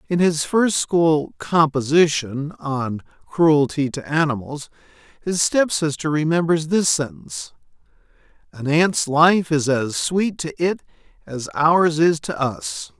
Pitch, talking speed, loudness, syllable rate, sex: 155 Hz, 125 wpm, -19 LUFS, 3.7 syllables/s, male